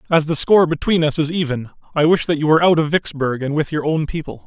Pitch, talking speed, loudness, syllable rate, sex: 155 Hz, 270 wpm, -17 LUFS, 6.5 syllables/s, male